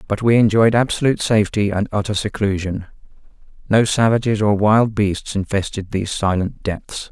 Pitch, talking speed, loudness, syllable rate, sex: 105 Hz, 145 wpm, -18 LUFS, 5.2 syllables/s, male